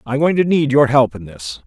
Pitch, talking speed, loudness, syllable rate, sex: 135 Hz, 290 wpm, -15 LUFS, 5.2 syllables/s, male